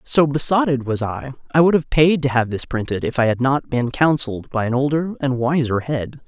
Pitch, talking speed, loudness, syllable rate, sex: 135 Hz, 230 wpm, -19 LUFS, 5.3 syllables/s, female